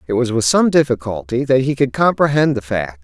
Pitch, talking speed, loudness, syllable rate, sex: 125 Hz, 220 wpm, -16 LUFS, 5.6 syllables/s, male